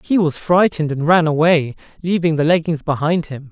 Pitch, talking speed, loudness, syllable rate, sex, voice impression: 160 Hz, 190 wpm, -16 LUFS, 5.4 syllables/s, male, masculine, adult-like, slightly soft, friendly, reassuring, kind